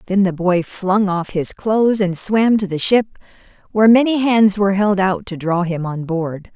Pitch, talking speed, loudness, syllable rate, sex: 195 Hz, 210 wpm, -17 LUFS, 4.7 syllables/s, female